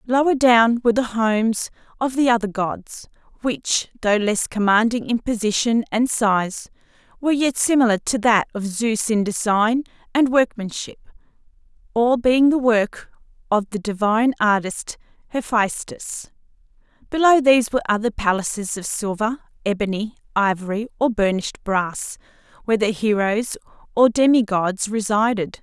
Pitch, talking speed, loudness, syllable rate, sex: 225 Hz, 130 wpm, -20 LUFS, 4.7 syllables/s, female